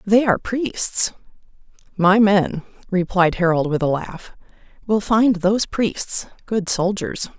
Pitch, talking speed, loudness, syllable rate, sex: 195 Hz, 130 wpm, -19 LUFS, 3.8 syllables/s, female